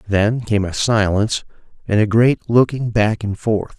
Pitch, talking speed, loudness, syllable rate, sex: 110 Hz, 175 wpm, -17 LUFS, 4.3 syllables/s, male